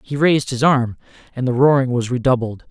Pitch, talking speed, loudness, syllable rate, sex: 130 Hz, 200 wpm, -17 LUFS, 5.8 syllables/s, male